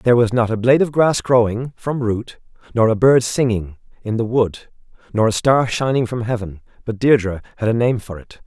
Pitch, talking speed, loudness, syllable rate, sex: 115 Hz, 215 wpm, -18 LUFS, 5.4 syllables/s, male